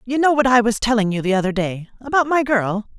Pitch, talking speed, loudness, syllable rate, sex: 230 Hz, 260 wpm, -18 LUFS, 6.0 syllables/s, female